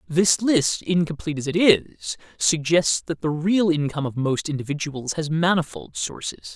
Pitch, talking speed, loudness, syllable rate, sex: 155 Hz, 155 wpm, -22 LUFS, 4.7 syllables/s, male